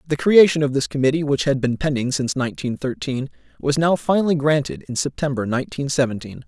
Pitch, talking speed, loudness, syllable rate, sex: 140 Hz, 185 wpm, -20 LUFS, 6.3 syllables/s, male